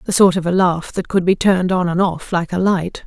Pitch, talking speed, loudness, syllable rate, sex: 180 Hz, 295 wpm, -17 LUFS, 5.5 syllables/s, female